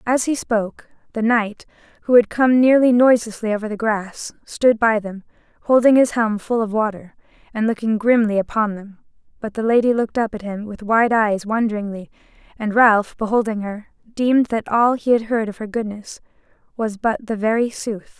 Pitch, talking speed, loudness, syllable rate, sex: 220 Hz, 185 wpm, -19 LUFS, 5.2 syllables/s, female